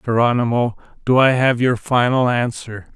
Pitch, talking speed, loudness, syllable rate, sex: 120 Hz, 140 wpm, -17 LUFS, 4.7 syllables/s, male